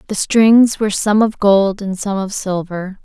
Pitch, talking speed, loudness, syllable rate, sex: 200 Hz, 195 wpm, -15 LUFS, 4.2 syllables/s, female